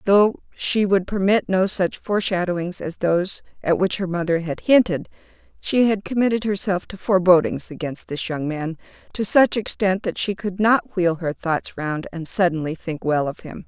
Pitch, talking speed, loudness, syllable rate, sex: 185 Hz, 185 wpm, -21 LUFS, 4.9 syllables/s, female